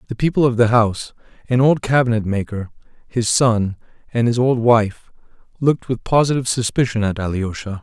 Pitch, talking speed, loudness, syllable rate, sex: 115 Hz, 160 wpm, -18 LUFS, 5.6 syllables/s, male